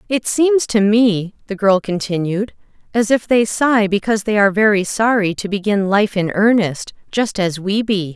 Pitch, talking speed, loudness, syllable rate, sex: 205 Hz, 175 wpm, -16 LUFS, 4.7 syllables/s, female